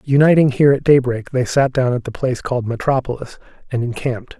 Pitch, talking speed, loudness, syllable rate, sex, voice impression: 130 Hz, 190 wpm, -17 LUFS, 6.3 syllables/s, male, very masculine, very adult-like, slightly old, thick, slightly relaxed, slightly weak, slightly dark, soft, muffled, fluent, slightly raspy, cool, very intellectual, sincere, very calm, very mature, friendly, very reassuring, very unique, slightly elegant, wild, sweet, kind, modest